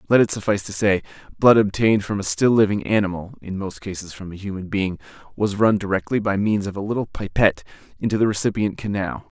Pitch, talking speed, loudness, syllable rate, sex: 100 Hz, 205 wpm, -21 LUFS, 6.2 syllables/s, male